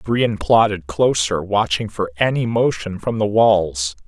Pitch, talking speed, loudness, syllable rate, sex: 105 Hz, 145 wpm, -18 LUFS, 3.9 syllables/s, male